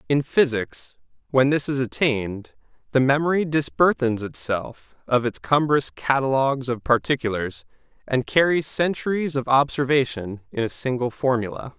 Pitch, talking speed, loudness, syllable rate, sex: 130 Hz, 125 wpm, -22 LUFS, 4.8 syllables/s, male